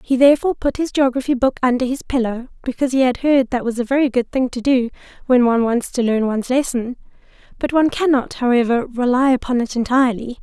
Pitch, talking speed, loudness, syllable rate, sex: 255 Hz, 205 wpm, -18 LUFS, 6.2 syllables/s, female